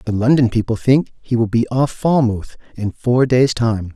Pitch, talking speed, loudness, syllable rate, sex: 120 Hz, 195 wpm, -17 LUFS, 4.7 syllables/s, male